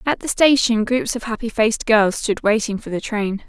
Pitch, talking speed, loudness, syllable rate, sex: 225 Hz, 225 wpm, -19 LUFS, 5.1 syllables/s, female